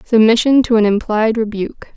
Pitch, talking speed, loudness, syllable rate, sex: 225 Hz, 155 wpm, -14 LUFS, 5.6 syllables/s, female